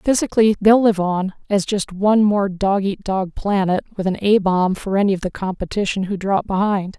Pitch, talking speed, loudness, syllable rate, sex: 195 Hz, 205 wpm, -18 LUFS, 5.1 syllables/s, female